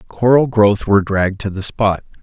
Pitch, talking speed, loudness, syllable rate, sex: 105 Hz, 190 wpm, -15 LUFS, 5.3 syllables/s, male